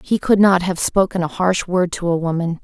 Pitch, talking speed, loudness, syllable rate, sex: 180 Hz, 250 wpm, -17 LUFS, 5.1 syllables/s, female